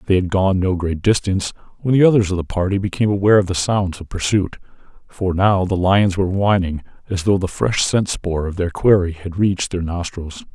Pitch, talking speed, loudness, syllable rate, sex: 95 Hz, 215 wpm, -18 LUFS, 5.6 syllables/s, male